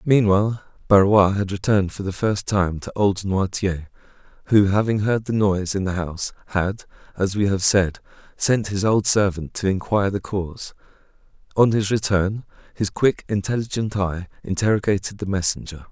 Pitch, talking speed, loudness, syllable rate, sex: 100 Hz, 160 wpm, -21 LUFS, 5.1 syllables/s, male